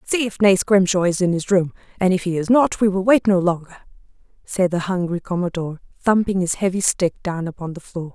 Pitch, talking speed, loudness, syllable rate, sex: 185 Hz, 220 wpm, -19 LUFS, 5.7 syllables/s, female